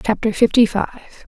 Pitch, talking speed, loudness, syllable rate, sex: 215 Hz, 135 wpm, -17 LUFS, 6.1 syllables/s, female